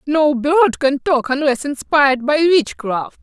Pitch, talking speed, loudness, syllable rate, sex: 285 Hz, 150 wpm, -16 LUFS, 4.1 syllables/s, female